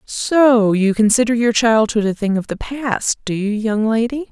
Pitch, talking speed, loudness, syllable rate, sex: 225 Hz, 195 wpm, -16 LUFS, 4.3 syllables/s, female